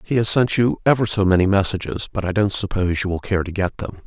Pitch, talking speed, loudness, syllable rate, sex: 100 Hz, 265 wpm, -20 LUFS, 6.2 syllables/s, male